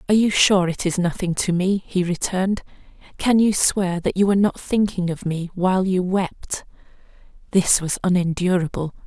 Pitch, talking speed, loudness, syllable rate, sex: 185 Hz, 170 wpm, -20 LUFS, 5.1 syllables/s, female